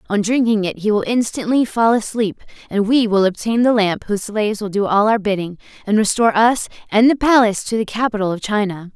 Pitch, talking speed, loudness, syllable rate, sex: 215 Hz, 215 wpm, -17 LUFS, 5.9 syllables/s, female